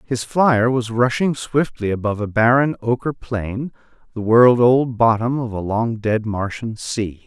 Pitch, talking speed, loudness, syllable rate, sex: 120 Hz, 155 wpm, -18 LUFS, 4.2 syllables/s, male